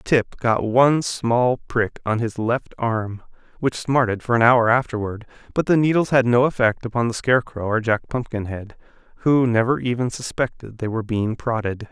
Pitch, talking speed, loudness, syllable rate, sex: 120 Hz, 175 wpm, -21 LUFS, 5.0 syllables/s, male